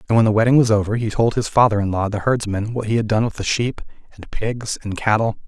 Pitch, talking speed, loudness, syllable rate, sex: 110 Hz, 275 wpm, -19 LUFS, 6.2 syllables/s, male